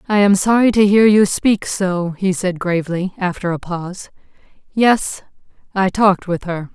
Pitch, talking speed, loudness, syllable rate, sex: 190 Hz, 170 wpm, -16 LUFS, 4.6 syllables/s, female